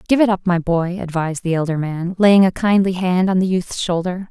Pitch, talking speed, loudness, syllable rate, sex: 180 Hz, 235 wpm, -17 LUFS, 5.4 syllables/s, female